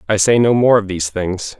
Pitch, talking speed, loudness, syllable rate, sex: 105 Hz, 265 wpm, -15 LUFS, 5.7 syllables/s, male